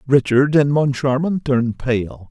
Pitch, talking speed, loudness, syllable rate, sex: 135 Hz, 130 wpm, -17 LUFS, 4.3 syllables/s, male